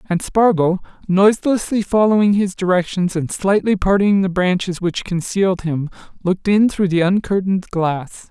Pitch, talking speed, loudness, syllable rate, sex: 190 Hz, 145 wpm, -17 LUFS, 4.9 syllables/s, male